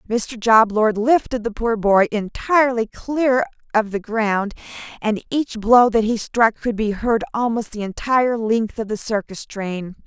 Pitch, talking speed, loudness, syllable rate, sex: 225 Hz, 175 wpm, -19 LUFS, 4.2 syllables/s, female